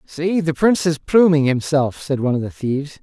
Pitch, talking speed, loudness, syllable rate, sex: 155 Hz, 220 wpm, -18 LUFS, 5.5 syllables/s, male